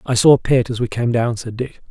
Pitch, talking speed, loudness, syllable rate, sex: 120 Hz, 315 wpm, -17 LUFS, 5.8 syllables/s, male